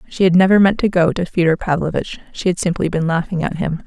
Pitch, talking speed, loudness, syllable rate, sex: 175 Hz, 250 wpm, -17 LUFS, 6.1 syllables/s, female